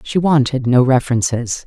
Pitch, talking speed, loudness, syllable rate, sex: 130 Hz, 145 wpm, -15 LUFS, 5.1 syllables/s, female